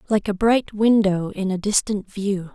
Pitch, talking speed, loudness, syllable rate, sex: 200 Hz, 190 wpm, -21 LUFS, 4.3 syllables/s, female